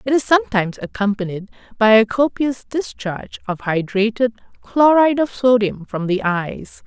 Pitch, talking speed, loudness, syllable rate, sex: 225 Hz, 140 wpm, -18 LUFS, 5.0 syllables/s, female